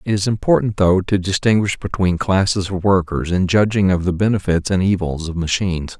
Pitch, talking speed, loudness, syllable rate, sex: 95 Hz, 190 wpm, -18 LUFS, 5.5 syllables/s, male